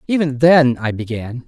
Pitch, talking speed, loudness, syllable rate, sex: 135 Hz, 165 wpm, -16 LUFS, 4.6 syllables/s, male